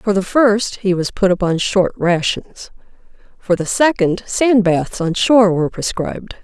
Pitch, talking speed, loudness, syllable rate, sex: 195 Hz, 170 wpm, -16 LUFS, 4.4 syllables/s, female